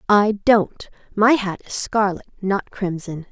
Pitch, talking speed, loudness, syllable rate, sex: 200 Hz, 145 wpm, -20 LUFS, 3.8 syllables/s, female